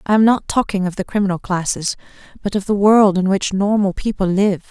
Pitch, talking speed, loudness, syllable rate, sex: 195 Hz, 215 wpm, -17 LUFS, 5.7 syllables/s, female